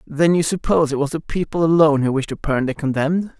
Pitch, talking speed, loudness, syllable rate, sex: 155 Hz, 245 wpm, -19 LUFS, 6.4 syllables/s, male